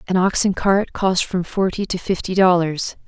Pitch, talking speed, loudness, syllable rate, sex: 185 Hz, 195 wpm, -19 LUFS, 4.6 syllables/s, female